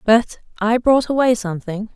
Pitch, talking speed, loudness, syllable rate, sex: 225 Hz, 155 wpm, -18 LUFS, 4.9 syllables/s, female